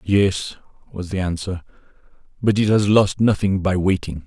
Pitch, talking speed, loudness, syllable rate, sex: 95 Hz, 155 wpm, -19 LUFS, 4.6 syllables/s, male